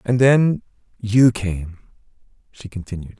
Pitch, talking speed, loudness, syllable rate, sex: 110 Hz, 115 wpm, -18 LUFS, 3.8 syllables/s, male